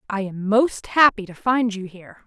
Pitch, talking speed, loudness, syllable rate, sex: 210 Hz, 210 wpm, -20 LUFS, 4.8 syllables/s, female